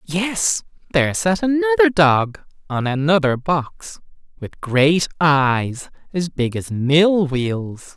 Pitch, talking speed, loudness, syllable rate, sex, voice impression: 160 Hz, 120 wpm, -18 LUFS, 3.2 syllables/s, male, slightly masculine, adult-like, refreshing, slightly unique, slightly lively